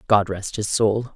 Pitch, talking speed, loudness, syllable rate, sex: 105 Hz, 210 wpm, -21 LUFS, 4.1 syllables/s, female